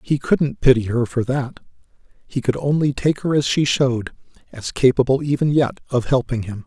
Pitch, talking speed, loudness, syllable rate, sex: 130 Hz, 180 wpm, -19 LUFS, 5.2 syllables/s, male